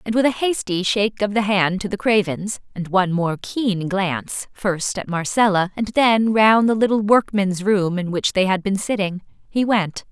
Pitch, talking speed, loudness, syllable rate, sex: 200 Hz, 200 wpm, -19 LUFS, 4.6 syllables/s, female